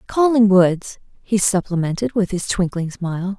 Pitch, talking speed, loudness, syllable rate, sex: 195 Hz, 125 wpm, -18 LUFS, 4.7 syllables/s, female